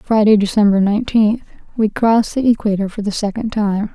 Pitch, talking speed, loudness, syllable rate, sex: 215 Hz, 165 wpm, -16 LUFS, 5.5 syllables/s, female